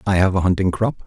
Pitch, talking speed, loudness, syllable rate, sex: 95 Hz, 280 wpm, -19 LUFS, 6.3 syllables/s, male